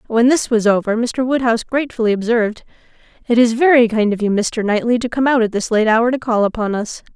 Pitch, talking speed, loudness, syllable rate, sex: 230 Hz, 225 wpm, -16 LUFS, 6.1 syllables/s, female